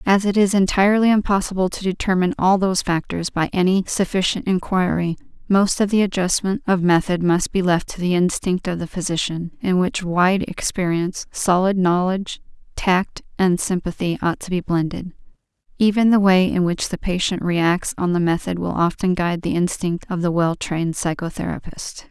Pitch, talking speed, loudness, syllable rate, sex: 185 Hz, 170 wpm, -20 LUFS, 5.2 syllables/s, female